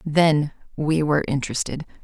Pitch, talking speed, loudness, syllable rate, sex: 150 Hz, 120 wpm, -22 LUFS, 5.1 syllables/s, female